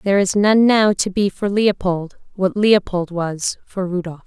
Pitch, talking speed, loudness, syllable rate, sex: 190 Hz, 185 wpm, -18 LUFS, 4.3 syllables/s, female